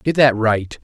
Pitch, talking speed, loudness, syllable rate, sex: 120 Hz, 215 wpm, -16 LUFS, 4.1 syllables/s, male